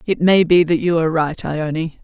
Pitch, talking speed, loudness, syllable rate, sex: 165 Hz, 235 wpm, -16 LUFS, 4.8 syllables/s, female